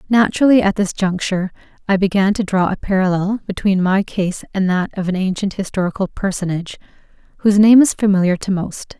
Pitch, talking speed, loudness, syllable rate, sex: 195 Hz, 175 wpm, -17 LUFS, 5.9 syllables/s, female